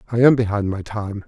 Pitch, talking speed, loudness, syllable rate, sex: 105 Hz, 235 wpm, -19 LUFS, 5.8 syllables/s, male